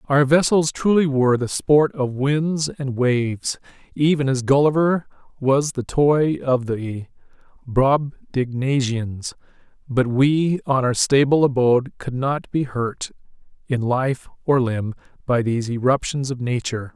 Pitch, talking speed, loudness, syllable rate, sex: 135 Hz, 135 wpm, -20 LUFS, 4.7 syllables/s, male